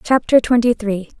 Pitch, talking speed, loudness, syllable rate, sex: 230 Hz, 150 wpm, -16 LUFS, 4.9 syllables/s, female